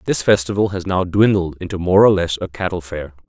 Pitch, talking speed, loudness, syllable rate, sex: 90 Hz, 220 wpm, -17 LUFS, 5.7 syllables/s, male